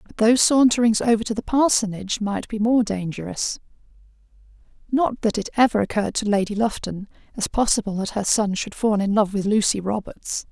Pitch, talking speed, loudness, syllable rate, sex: 215 Hz, 175 wpm, -21 LUFS, 5.7 syllables/s, female